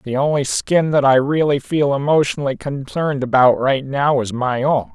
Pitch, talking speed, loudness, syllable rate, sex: 135 Hz, 180 wpm, -17 LUFS, 4.9 syllables/s, male